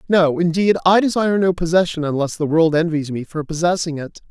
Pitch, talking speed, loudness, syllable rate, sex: 170 Hz, 195 wpm, -18 LUFS, 5.8 syllables/s, male